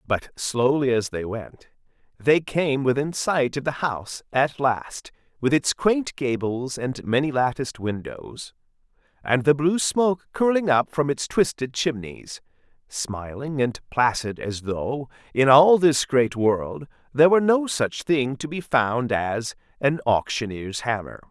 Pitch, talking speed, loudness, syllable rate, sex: 135 Hz, 145 wpm, -23 LUFS, 4.0 syllables/s, male